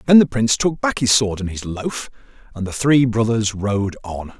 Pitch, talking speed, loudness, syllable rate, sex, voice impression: 115 Hz, 220 wpm, -18 LUFS, 4.9 syllables/s, male, masculine, middle-aged, tensed, powerful, clear, slightly fluent, cool, intellectual, mature, wild, lively, slightly intense